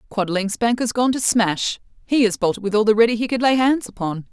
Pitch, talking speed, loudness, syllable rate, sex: 225 Hz, 250 wpm, -19 LUFS, 5.7 syllables/s, female